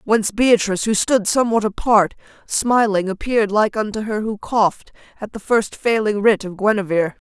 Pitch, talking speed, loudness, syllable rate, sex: 210 Hz, 165 wpm, -18 LUFS, 5.3 syllables/s, female